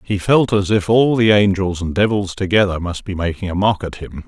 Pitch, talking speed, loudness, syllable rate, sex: 100 Hz, 240 wpm, -17 LUFS, 5.3 syllables/s, male